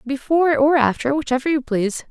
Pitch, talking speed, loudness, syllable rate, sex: 275 Hz, 170 wpm, -18 LUFS, 6.1 syllables/s, female